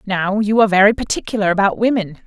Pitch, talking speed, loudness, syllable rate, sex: 200 Hz, 185 wpm, -16 LUFS, 6.8 syllables/s, female